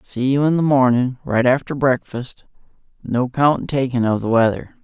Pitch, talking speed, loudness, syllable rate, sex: 130 Hz, 175 wpm, -18 LUFS, 4.6 syllables/s, male